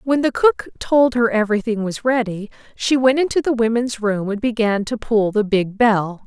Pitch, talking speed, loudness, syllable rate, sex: 230 Hz, 200 wpm, -18 LUFS, 4.8 syllables/s, female